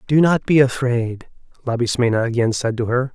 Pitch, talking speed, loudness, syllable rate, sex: 125 Hz, 170 wpm, -18 LUFS, 5.3 syllables/s, male